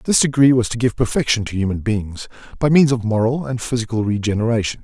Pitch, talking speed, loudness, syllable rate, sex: 115 Hz, 200 wpm, -18 LUFS, 6.0 syllables/s, male